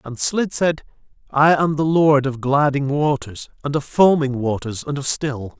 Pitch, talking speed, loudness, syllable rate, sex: 145 Hz, 180 wpm, -19 LUFS, 4.4 syllables/s, male